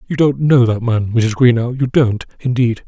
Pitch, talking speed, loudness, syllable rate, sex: 120 Hz, 210 wpm, -15 LUFS, 4.7 syllables/s, male